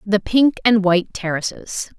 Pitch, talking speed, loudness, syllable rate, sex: 195 Hz, 150 wpm, -18 LUFS, 4.4 syllables/s, female